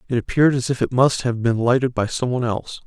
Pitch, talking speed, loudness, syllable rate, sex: 125 Hz, 270 wpm, -20 LUFS, 6.8 syllables/s, male